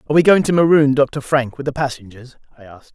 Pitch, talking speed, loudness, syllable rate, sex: 135 Hz, 245 wpm, -16 LUFS, 6.5 syllables/s, male